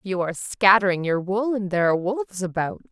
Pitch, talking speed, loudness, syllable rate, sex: 185 Hz, 205 wpm, -22 LUFS, 6.2 syllables/s, female